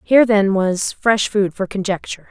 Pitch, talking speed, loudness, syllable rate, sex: 200 Hz, 180 wpm, -17 LUFS, 5.0 syllables/s, female